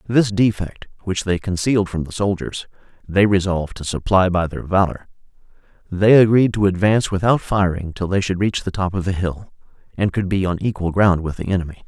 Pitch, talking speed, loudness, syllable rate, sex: 95 Hz, 195 wpm, -19 LUFS, 5.6 syllables/s, male